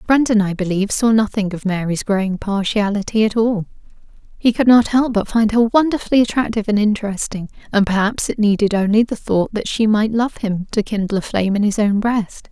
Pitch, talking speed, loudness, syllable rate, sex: 210 Hz, 200 wpm, -17 LUFS, 5.7 syllables/s, female